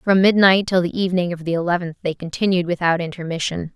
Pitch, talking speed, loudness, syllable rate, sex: 175 Hz, 190 wpm, -19 LUFS, 6.3 syllables/s, female